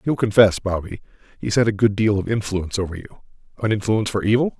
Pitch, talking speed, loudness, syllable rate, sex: 105 Hz, 195 wpm, -20 LUFS, 6.5 syllables/s, male